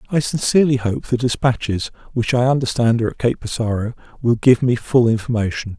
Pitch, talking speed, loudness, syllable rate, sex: 120 Hz, 175 wpm, -18 LUFS, 6.0 syllables/s, male